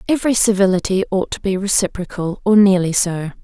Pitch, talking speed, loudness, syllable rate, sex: 190 Hz, 155 wpm, -17 LUFS, 5.8 syllables/s, female